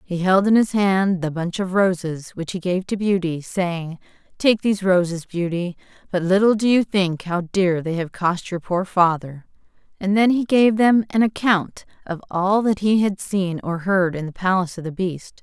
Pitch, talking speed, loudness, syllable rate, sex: 185 Hz, 205 wpm, -20 LUFS, 4.6 syllables/s, female